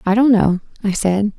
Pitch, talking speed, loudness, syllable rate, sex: 210 Hz, 215 wpm, -16 LUFS, 5.0 syllables/s, female